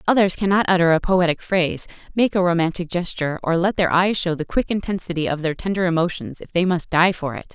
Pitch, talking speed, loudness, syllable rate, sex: 175 Hz, 225 wpm, -20 LUFS, 6.2 syllables/s, female